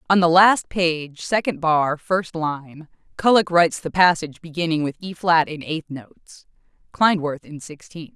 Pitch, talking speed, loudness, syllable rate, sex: 165 Hz, 160 wpm, -20 LUFS, 4.5 syllables/s, female